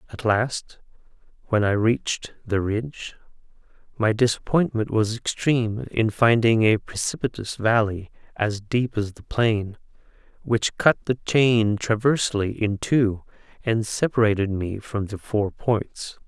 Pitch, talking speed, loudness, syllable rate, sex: 110 Hz, 130 wpm, -23 LUFS, 4.1 syllables/s, male